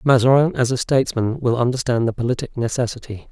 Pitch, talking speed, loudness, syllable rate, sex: 120 Hz, 165 wpm, -19 LUFS, 6.2 syllables/s, male